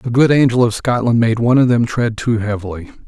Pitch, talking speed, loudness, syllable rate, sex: 115 Hz, 235 wpm, -15 LUFS, 5.7 syllables/s, male